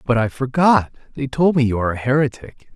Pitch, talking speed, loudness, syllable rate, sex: 130 Hz, 195 wpm, -18 LUFS, 5.9 syllables/s, male